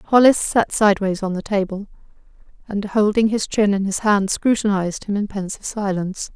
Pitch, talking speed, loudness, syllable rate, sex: 205 Hz, 170 wpm, -19 LUFS, 5.4 syllables/s, female